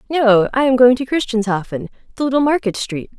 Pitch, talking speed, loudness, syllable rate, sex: 240 Hz, 190 wpm, -16 LUFS, 5.8 syllables/s, female